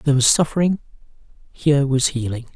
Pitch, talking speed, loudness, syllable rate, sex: 140 Hz, 140 wpm, -19 LUFS, 6.3 syllables/s, male